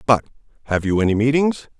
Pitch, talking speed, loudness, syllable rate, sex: 125 Hz, 165 wpm, -19 LUFS, 6.2 syllables/s, male